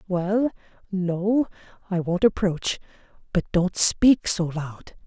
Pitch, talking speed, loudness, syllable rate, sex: 190 Hz, 120 wpm, -23 LUFS, 3.2 syllables/s, female